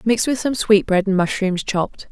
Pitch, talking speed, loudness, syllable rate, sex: 205 Hz, 200 wpm, -18 LUFS, 5.0 syllables/s, female